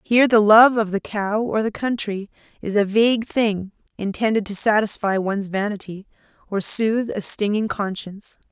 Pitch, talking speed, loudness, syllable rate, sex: 210 Hz, 160 wpm, -20 LUFS, 5.1 syllables/s, female